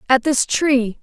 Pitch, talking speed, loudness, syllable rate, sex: 260 Hz, 175 wpm, -17 LUFS, 3.6 syllables/s, female